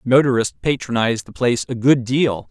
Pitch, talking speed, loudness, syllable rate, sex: 125 Hz, 170 wpm, -18 LUFS, 5.6 syllables/s, male